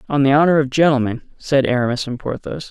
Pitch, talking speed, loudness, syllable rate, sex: 135 Hz, 200 wpm, -17 LUFS, 6.0 syllables/s, male